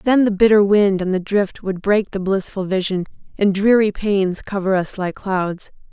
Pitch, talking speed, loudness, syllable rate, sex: 195 Hz, 195 wpm, -18 LUFS, 4.5 syllables/s, female